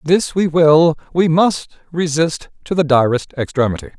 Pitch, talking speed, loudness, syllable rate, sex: 155 Hz, 150 wpm, -15 LUFS, 4.6 syllables/s, male